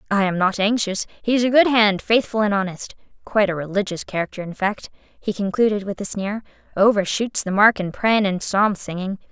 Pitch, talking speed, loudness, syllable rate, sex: 205 Hz, 195 wpm, -20 LUFS, 5.3 syllables/s, female